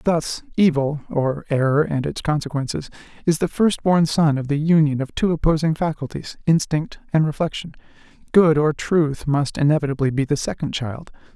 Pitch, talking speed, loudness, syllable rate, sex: 150 Hz, 150 wpm, -20 LUFS, 5.1 syllables/s, male